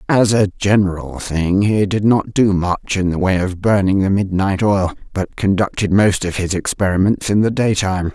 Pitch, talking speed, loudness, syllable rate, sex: 95 Hz, 190 wpm, -16 LUFS, 4.8 syllables/s, female